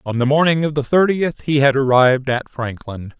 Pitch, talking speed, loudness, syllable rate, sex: 140 Hz, 205 wpm, -16 LUFS, 5.2 syllables/s, male